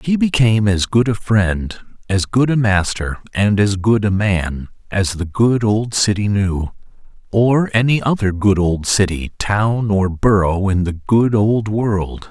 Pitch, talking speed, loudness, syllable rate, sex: 105 Hz, 170 wpm, -16 LUFS, 3.9 syllables/s, male